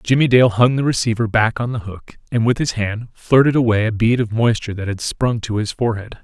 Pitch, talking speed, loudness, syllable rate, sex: 115 Hz, 230 wpm, -17 LUFS, 5.6 syllables/s, male